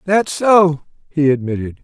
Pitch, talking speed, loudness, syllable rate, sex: 155 Hz, 130 wpm, -15 LUFS, 4.2 syllables/s, male